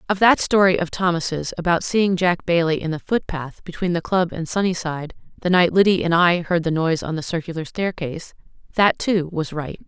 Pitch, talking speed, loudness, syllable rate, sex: 170 Hz, 195 wpm, -20 LUFS, 5.6 syllables/s, female